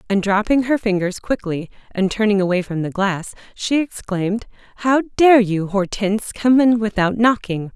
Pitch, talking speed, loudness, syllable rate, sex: 210 Hz, 160 wpm, -18 LUFS, 4.7 syllables/s, female